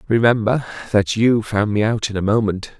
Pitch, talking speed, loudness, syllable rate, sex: 110 Hz, 195 wpm, -18 LUFS, 5.3 syllables/s, male